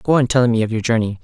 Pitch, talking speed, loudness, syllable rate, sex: 115 Hz, 340 wpm, -17 LUFS, 7.6 syllables/s, male